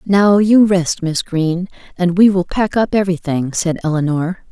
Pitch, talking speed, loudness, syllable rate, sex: 180 Hz, 175 wpm, -15 LUFS, 4.4 syllables/s, female